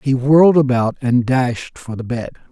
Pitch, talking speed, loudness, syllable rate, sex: 130 Hz, 190 wpm, -15 LUFS, 4.4 syllables/s, male